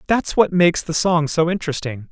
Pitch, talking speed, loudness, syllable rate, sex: 170 Hz, 200 wpm, -18 LUFS, 5.7 syllables/s, male